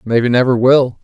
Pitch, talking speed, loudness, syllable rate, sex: 125 Hz, 175 wpm, -12 LUFS, 5.4 syllables/s, male